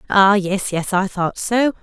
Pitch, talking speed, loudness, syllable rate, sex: 200 Hz, 195 wpm, -18 LUFS, 3.9 syllables/s, female